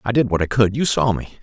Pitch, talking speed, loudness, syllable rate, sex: 110 Hz, 335 wpm, -18 LUFS, 6.1 syllables/s, male